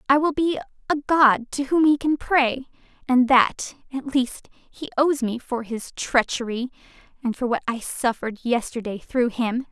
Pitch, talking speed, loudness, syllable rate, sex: 255 Hz, 165 wpm, -22 LUFS, 4.4 syllables/s, female